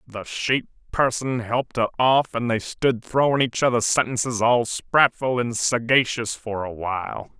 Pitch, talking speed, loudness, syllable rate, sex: 120 Hz, 160 wpm, -22 LUFS, 4.5 syllables/s, male